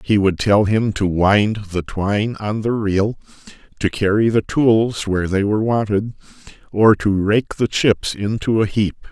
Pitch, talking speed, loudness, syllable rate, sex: 105 Hz, 180 wpm, -18 LUFS, 4.3 syllables/s, male